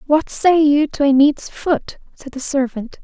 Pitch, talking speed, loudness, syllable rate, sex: 285 Hz, 195 wpm, -16 LUFS, 4.1 syllables/s, female